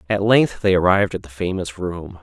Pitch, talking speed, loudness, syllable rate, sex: 95 Hz, 215 wpm, -19 LUFS, 5.4 syllables/s, male